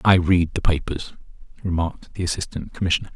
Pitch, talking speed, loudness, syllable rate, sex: 85 Hz, 150 wpm, -23 LUFS, 6.2 syllables/s, male